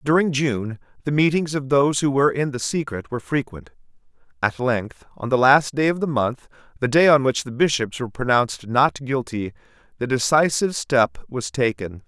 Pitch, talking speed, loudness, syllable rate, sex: 130 Hz, 185 wpm, -21 LUFS, 5.3 syllables/s, male